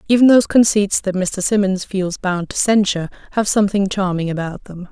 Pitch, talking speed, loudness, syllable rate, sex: 195 Hz, 185 wpm, -17 LUFS, 5.6 syllables/s, female